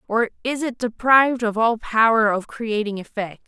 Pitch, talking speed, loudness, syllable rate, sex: 225 Hz, 175 wpm, -20 LUFS, 4.7 syllables/s, female